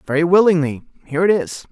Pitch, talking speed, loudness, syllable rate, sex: 160 Hz, 175 wpm, -16 LUFS, 6.5 syllables/s, male